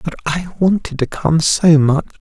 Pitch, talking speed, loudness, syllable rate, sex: 160 Hz, 185 wpm, -15 LUFS, 4.3 syllables/s, male